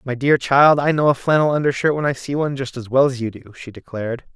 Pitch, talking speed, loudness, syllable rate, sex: 135 Hz, 275 wpm, -18 LUFS, 6.2 syllables/s, male